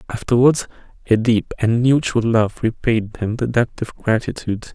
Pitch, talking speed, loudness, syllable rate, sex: 115 Hz, 150 wpm, -19 LUFS, 4.9 syllables/s, male